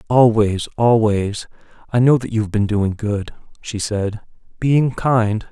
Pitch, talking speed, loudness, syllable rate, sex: 110 Hz, 140 wpm, -18 LUFS, 3.8 syllables/s, male